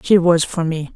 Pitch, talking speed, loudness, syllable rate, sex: 170 Hz, 250 wpm, -17 LUFS, 4.8 syllables/s, female